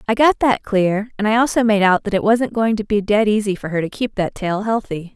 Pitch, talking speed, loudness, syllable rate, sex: 210 Hz, 280 wpm, -18 LUFS, 5.5 syllables/s, female